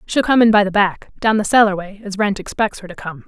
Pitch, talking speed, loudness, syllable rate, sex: 200 Hz, 275 wpm, -16 LUFS, 6.0 syllables/s, female